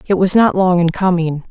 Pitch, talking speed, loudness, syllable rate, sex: 180 Hz, 240 wpm, -14 LUFS, 5.3 syllables/s, female